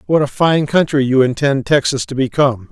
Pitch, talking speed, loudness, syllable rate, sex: 135 Hz, 200 wpm, -15 LUFS, 5.5 syllables/s, male